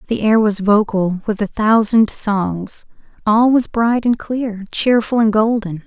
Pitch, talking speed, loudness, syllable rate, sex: 215 Hz, 165 wpm, -16 LUFS, 3.9 syllables/s, female